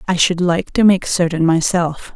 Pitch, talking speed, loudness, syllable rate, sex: 175 Hz, 195 wpm, -16 LUFS, 4.5 syllables/s, female